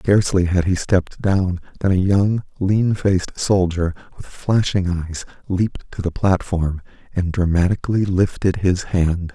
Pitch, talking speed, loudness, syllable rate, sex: 95 Hz, 150 wpm, -19 LUFS, 4.4 syllables/s, male